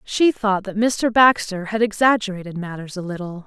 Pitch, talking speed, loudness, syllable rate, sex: 205 Hz, 175 wpm, -20 LUFS, 5.0 syllables/s, female